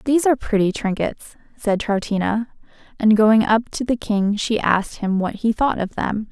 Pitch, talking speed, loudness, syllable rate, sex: 215 Hz, 190 wpm, -20 LUFS, 4.9 syllables/s, female